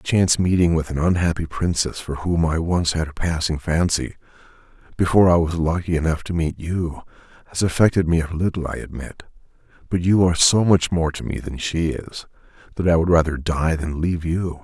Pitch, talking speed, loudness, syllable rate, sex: 85 Hz, 200 wpm, -20 LUFS, 5.5 syllables/s, male